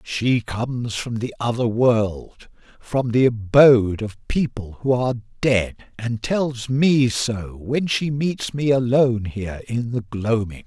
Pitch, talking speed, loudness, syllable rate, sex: 120 Hz, 145 wpm, -21 LUFS, 3.7 syllables/s, male